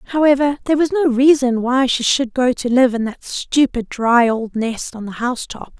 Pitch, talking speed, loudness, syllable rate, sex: 255 Hz, 215 wpm, -17 LUFS, 4.8 syllables/s, female